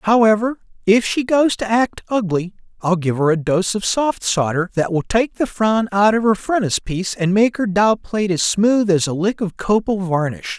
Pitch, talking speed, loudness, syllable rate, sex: 205 Hz, 210 wpm, -18 LUFS, 4.8 syllables/s, male